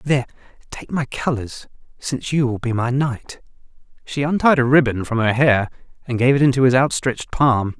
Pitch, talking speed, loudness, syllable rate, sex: 130 Hz, 190 wpm, -19 LUFS, 5.5 syllables/s, male